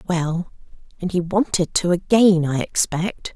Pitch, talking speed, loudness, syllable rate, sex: 175 Hz, 145 wpm, -20 LUFS, 4.1 syllables/s, female